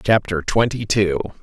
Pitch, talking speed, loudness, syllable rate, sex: 100 Hz, 125 wpm, -19 LUFS, 4.6 syllables/s, male